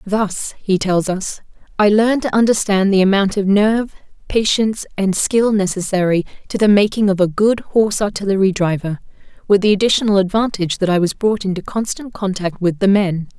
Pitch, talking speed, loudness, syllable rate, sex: 200 Hz, 175 wpm, -16 LUFS, 5.5 syllables/s, female